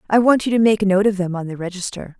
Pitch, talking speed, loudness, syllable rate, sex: 200 Hz, 330 wpm, -18 LUFS, 7.1 syllables/s, female